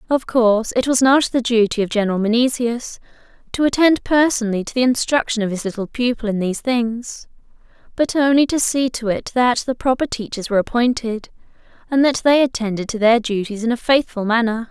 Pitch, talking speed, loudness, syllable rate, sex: 240 Hz, 190 wpm, -18 LUFS, 5.7 syllables/s, female